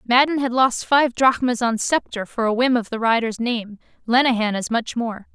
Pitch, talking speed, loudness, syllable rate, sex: 240 Hz, 200 wpm, -20 LUFS, 4.9 syllables/s, female